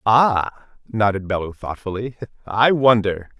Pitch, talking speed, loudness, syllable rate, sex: 110 Hz, 105 wpm, -19 LUFS, 4.0 syllables/s, male